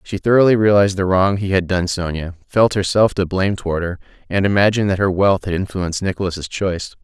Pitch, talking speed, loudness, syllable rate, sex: 95 Hz, 205 wpm, -17 LUFS, 6.2 syllables/s, male